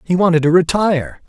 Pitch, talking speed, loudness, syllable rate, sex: 170 Hz, 190 wpm, -15 LUFS, 6.0 syllables/s, male